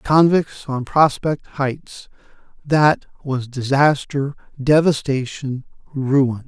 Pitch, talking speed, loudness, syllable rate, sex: 140 Hz, 95 wpm, -19 LUFS, 3.3 syllables/s, male